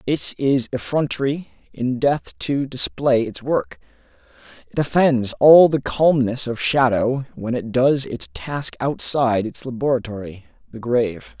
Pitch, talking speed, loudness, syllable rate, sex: 125 Hz, 135 wpm, -20 LUFS, 4.2 syllables/s, male